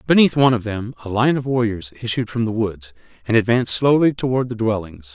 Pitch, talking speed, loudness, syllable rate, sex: 115 Hz, 210 wpm, -19 LUFS, 6.0 syllables/s, male